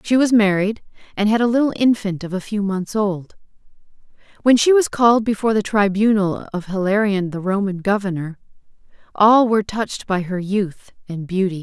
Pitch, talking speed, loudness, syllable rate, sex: 205 Hz, 170 wpm, -18 LUFS, 5.3 syllables/s, female